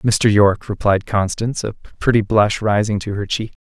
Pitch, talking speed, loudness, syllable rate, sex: 105 Hz, 180 wpm, -17 LUFS, 5.2 syllables/s, male